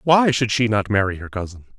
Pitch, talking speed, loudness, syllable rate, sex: 115 Hz, 235 wpm, -20 LUFS, 5.7 syllables/s, male